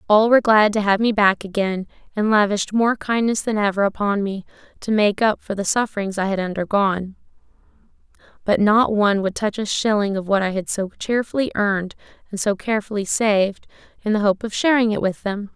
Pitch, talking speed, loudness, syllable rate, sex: 205 Hz, 195 wpm, -20 LUFS, 5.7 syllables/s, female